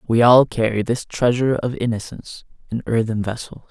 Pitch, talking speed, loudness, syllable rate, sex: 115 Hz, 160 wpm, -19 LUFS, 5.1 syllables/s, male